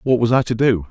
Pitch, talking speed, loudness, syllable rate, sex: 115 Hz, 335 wpm, -17 LUFS, 6.3 syllables/s, male